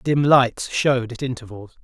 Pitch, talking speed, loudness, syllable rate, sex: 125 Hz, 165 wpm, -19 LUFS, 4.7 syllables/s, male